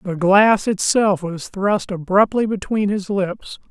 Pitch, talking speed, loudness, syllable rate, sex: 195 Hz, 145 wpm, -18 LUFS, 3.7 syllables/s, male